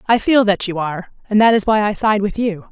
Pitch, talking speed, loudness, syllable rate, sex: 210 Hz, 285 wpm, -16 LUFS, 5.9 syllables/s, female